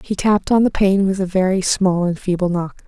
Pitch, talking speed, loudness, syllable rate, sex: 190 Hz, 250 wpm, -17 LUFS, 5.5 syllables/s, female